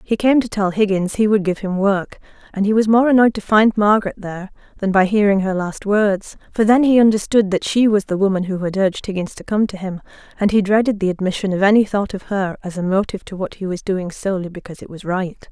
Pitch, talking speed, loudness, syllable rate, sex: 200 Hz, 250 wpm, -17 LUFS, 6.1 syllables/s, female